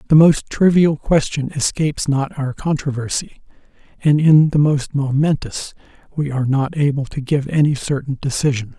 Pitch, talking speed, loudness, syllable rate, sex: 145 Hz, 150 wpm, -17 LUFS, 4.9 syllables/s, male